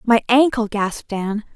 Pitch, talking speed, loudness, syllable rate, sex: 225 Hz, 155 wpm, -19 LUFS, 5.3 syllables/s, female